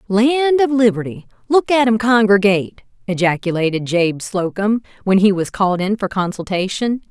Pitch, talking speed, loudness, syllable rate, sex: 210 Hz, 145 wpm, -16 LUFS, 5.0 syllables/s, female